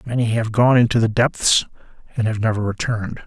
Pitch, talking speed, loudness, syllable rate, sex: 115 Hz, 185 wpm, -18 LUFS, 5.7 syllables/s, male